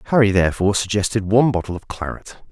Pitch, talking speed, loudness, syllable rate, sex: 100 Hz, 165 wpm, -19 LUFS, 7.2 syllables/s, male